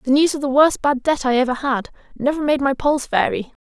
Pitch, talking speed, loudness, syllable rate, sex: 270 Hz, 250 wpm, -18 LUFS, 5.9 syllables/s, female